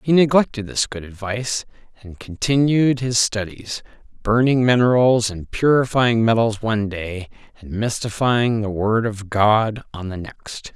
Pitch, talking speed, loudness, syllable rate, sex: 115 Hz, 140 wpm, -19 LUFS, 4.3 syllables/s, male